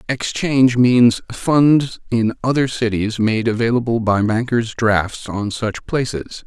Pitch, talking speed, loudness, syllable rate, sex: 115 Hz, 130 wpm, -17 LUFS, 3.8 syllables/s, male